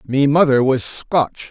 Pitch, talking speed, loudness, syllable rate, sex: 135 Hz, 160 wpm, -16 LUFS, 3.6 syllables/s, male